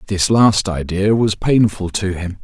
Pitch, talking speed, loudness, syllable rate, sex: 100 Hz, 170 wpm, -16 LUFS, 4.1 syllables/s, male